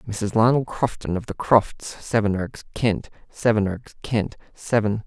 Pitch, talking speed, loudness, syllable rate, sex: 110 Hz, 105 wpm, -23 LUFS, 4.3 syllables/s, male